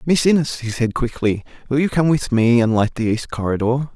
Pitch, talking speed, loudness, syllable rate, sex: 125 Hz, 225 wpm, -19 LUFS, 5.3 syllables/s, male